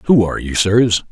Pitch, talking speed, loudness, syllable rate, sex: 105 Hz, 215 wpm, -15 LUFS, 4.8 syllables/s, male